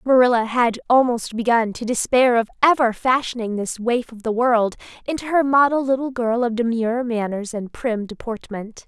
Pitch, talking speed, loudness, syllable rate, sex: 235 Hz, 170 wpm, -20 LUFS, 5.0 syllables/s, female